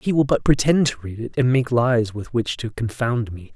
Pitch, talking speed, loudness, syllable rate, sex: 120 Hz, 255 wpm, -21 LUFS, 4.8 syllables/s, male